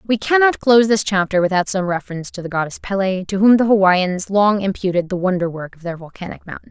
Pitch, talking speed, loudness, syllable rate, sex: 195 Hz, 225 wpm, -17 LUFS, 6.2 syllables/s, female